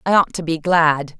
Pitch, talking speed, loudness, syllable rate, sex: 165 Hz, 250 wpm, -17 LUFS, 4.7 syllables/s, female